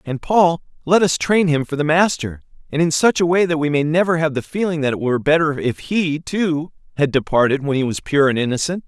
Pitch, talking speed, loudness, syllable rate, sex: 155 Hz, 245 wpm, -18 LUFS, 5.7 syllables/s, male